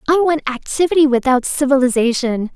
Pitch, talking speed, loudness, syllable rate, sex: 270 Hz, 115 wpm, -16 LUFS, 5.7 syllables/s, female